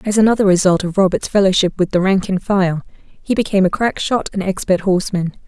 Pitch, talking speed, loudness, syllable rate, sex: 190 Hz, 210 wpm, -16 LUFS, 5.9 syllables/s, female